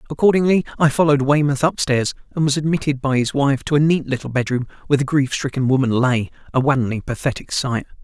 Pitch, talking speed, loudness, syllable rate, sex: 140 Hz, 195 wpm, -19 LUFS, 6.2 syllables/s, male